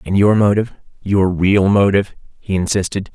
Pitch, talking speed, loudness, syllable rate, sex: 100 Hz, 135 wpm, -15 LUFS, 5.5 syllables/s, male